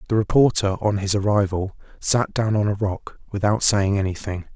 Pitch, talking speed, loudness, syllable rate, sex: 100 Hz, 170 wpm, -21 LUFS, 5.1 syllables/s, male